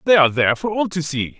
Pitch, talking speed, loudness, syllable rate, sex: 160 Hz, 300 wpm, -18 LUFS, 7.2 syllables/s, male